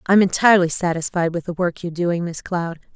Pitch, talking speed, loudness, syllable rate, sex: 175 Hz, 205 wpm, -20 LUFS, 5.9 syllables/s, female